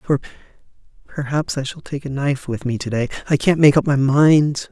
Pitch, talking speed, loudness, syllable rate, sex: 140 Hz, 215 wpm, -18 LUFS, 5.4 syllables/s, male